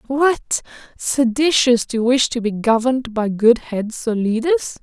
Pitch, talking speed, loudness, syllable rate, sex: 245 Hz, 150 wpm, -18 LUFS, 4.0 syllables/s, female